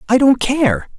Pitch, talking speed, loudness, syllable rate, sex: 225 Hz, 185 wpm, -15 LUFS, 4.0 syllables/s, male